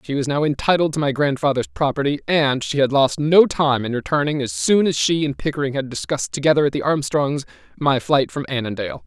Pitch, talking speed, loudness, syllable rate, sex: 140 Hz, 210 wpm, -19 LUFS, 5.9 syllables/s, male